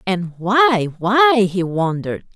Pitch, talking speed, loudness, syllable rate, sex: 205 Hz, 100 wpm, -16 LUFS, 3.5 syllables/s, female